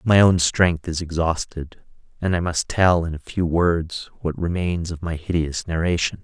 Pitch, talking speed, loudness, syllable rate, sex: 85 Hz, 185 wpm, -22 LUFS, 4.4 syllables/s, male